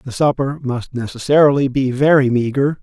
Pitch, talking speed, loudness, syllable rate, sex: 135 Hz, 150 wpm, -16 LUFS, 5.1 syllables/s, male